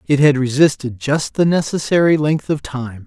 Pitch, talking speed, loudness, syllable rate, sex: 145 Hz, 175 wpm, -16 LUFS, 4.8 syllables/s, male